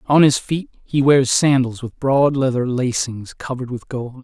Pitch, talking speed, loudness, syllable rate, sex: 130 Hz, 185 wpm, -18 LUFS, 4.5 syllables/s, male